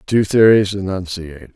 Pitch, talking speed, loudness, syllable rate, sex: 95 Hz, 115 wpm, -15 LUFS, 4.9 syllables/s, male